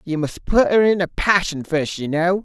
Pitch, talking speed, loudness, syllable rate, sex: 175 Hz, 245 wpm, -19 LUFS, 4.7 syllables/s, male